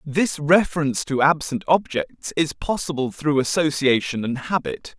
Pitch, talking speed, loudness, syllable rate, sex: 150 Hz, 130 wpm, -21 LUFS, 4.6 syllables/s, male